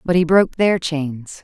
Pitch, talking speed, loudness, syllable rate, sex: 165 Hz, 210 wpm, -17 LUFS, 4.5 syllables/s, female